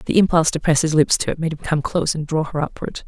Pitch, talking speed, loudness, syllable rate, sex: 155 Hz, 310 wpm, -19 LUFS, 6.6 syllables/s, female